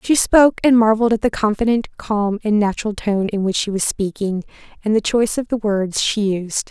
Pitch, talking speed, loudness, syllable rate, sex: 215 Hz, 215 wpm, -18 LUFS, 5.5 syllables/s, female